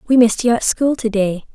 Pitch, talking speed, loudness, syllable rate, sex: 230 Hz, 270 wpm, -16 LUFS, 6.2 syllables/s, female